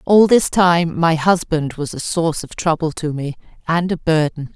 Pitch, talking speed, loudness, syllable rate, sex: 165 Hz, 200 wpm, -17 LUFS, 4.6 syllables/s, female